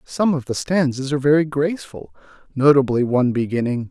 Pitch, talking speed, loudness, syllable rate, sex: 135 Hz, 155 wpm, -19 LUFS, 5.9 syllables/s, male